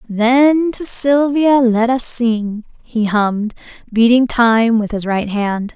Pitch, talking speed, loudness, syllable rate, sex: 235 Hz, 145 wpm, -15 LUFS, 3.4 syllables/s, female